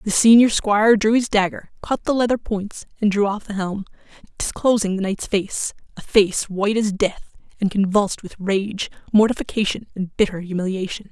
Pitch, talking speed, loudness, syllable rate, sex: 205 Hz, 165 wpm, -20 LUFS, 5.2 syllables/s, female